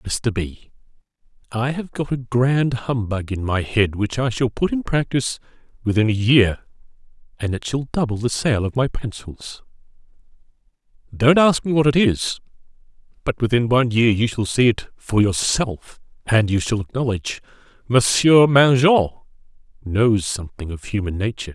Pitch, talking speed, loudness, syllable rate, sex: 115 Hz, 155 wpm, -19 LUFS, 4.8 syllables/s, male